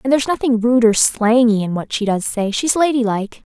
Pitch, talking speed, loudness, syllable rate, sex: 235 Hz, 220 wpm, -16 LUFS, 5.7 syllables/s, female